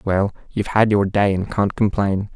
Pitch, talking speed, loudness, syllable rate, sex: 100 Hz, 205 wpm, -19 LUFS, 4.8 syllables/s, male